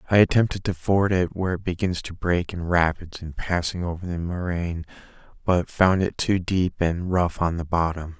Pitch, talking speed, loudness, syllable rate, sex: 90 Hz, 200 wpm, -24 LUFS, 5.0 syllables/s, male